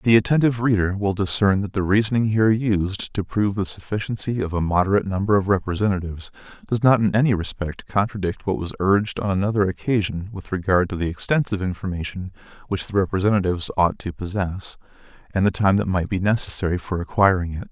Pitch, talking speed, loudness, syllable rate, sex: 100 Hz, 185 wpm, -22 LUFS, 6.3 syllables/s, male